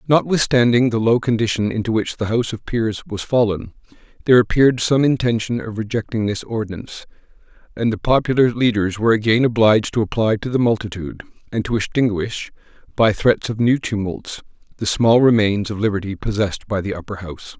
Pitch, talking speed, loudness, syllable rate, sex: 110 Hz, 170 wpm, -18 LUFS, 5.9 syllables/s, male